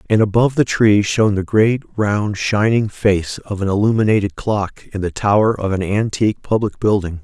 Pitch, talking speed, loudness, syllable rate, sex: 105 Hz, 180 wpm, -17 LUFS, 5.0 syllables/s, male